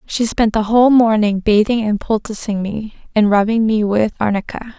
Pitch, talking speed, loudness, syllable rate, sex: 215 Hz, 175 wpm, -15 LUFS, 5.2 syllables/s, female